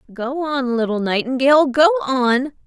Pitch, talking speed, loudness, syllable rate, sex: 270 Hz, 135 wpm, -17 LUFS, 4.7 syllables/s, female